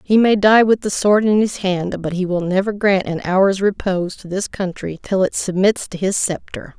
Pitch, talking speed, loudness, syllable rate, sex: 195 Hz, 230 wpm, -17 LUFS, 4.8 syllables/s, female